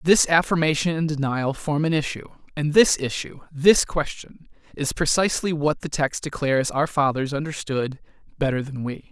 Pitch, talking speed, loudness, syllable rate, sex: 150 Hz, 150 wpm, -22 LUFS, 5.0 syllables/s, male